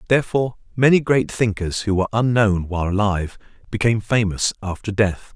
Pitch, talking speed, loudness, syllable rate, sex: 105 Hz, 145 wpm, -20 LUFS, 6.0 syllables/s, male